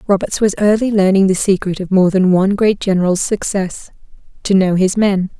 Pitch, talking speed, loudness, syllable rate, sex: 195 Hz, 180 wpm, -14 LUFS, 5.4 syllables/s, female